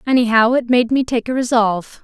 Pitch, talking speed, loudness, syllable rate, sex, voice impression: 240 Hz, 205 wpm, -16 LUFS, 5.8 syllables/s, female, feminine, slightly adult-like, slightly bright, slightly clear, slightly cute, sincere